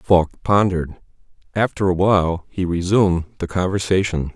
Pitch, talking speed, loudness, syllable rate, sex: 90 Hz, 125 wpm, -19 LUFS, 5.2 syllables/s, male